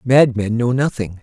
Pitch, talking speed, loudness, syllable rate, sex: 120 Hz, 145 wpm, -17 LUFS, 4.4 syllables/s, male